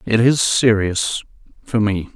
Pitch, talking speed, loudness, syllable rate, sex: 110 Hz, 110 wpm, -17 LUFS, 3.8 syllables/s, male